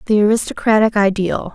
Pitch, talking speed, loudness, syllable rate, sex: 210 Hz, 115 wpm, -16 LUFS, 5.8 syllables/s, female